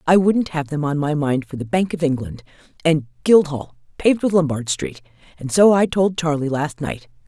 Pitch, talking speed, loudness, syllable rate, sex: 155 Hz, 205 wpm, -19 LUFS, 5.1 syllables/s, female